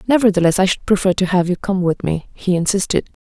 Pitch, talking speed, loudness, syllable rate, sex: 185 Hz, 220 wpm, -17 LUFS, 6.2 syllables/s, female